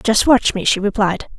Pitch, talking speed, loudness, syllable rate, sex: 215 Hz, 215 wpm, -16 LUFS, 4.7 syllables/s, female